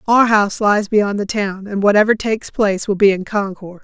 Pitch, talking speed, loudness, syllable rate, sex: 205 Hz, 220 wpm, -16 LUFS, 5.5 syllables/s, female